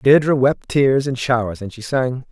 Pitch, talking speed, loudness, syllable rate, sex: 125 Hz, 205 wpm, -18 LUFS, 4.4 syllables/s, male